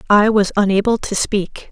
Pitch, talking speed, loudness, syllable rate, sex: 205 Hz, 175 wpm, -16 LUFS, 4.8 syllables/s, female